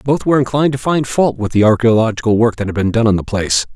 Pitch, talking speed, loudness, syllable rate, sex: 115 Hz, 270 wpm, -14 LUFS, 6.9 syllables/s, male